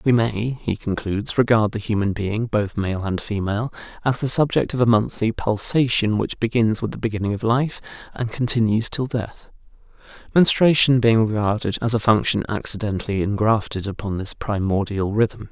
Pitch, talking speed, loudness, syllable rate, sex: 110 Hz, 155 wpm, -21 LUFS, 5.2 syllables/s, male